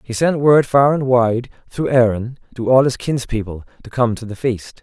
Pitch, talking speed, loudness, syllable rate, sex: 125 Hz, 210 wpm, -17 LUFS, 4.8 syllables/s, male